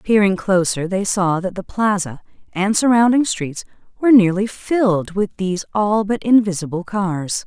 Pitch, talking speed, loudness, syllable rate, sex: 200 Hz, 155 wpm, -18 LUFS, 4.7 syllables/s, female